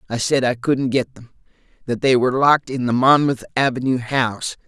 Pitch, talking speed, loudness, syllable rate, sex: 130 Hz, 180 wpm, -18 LUFS, 5.7 syllables/s, male